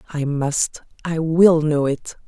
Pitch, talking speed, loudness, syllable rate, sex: 155 Hz, 130 wpm, -19 LUFS, 3.6 syllables/s, female